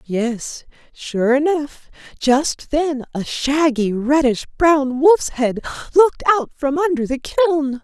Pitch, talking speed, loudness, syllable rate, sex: 285 Hz, 130 wpm, -18 LUFS, 3.4 syllables/s, female